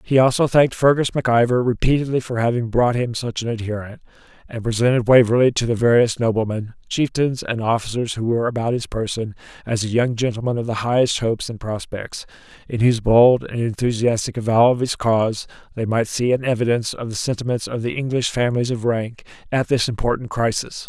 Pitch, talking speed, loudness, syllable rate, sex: 120 Hz, 190 wpm, -20 LUFS, 5.9 syllables/s, male